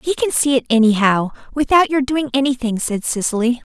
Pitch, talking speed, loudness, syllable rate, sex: 255 Hz, 180 wpm, -17 LUFS, 5.5 syllables/s, female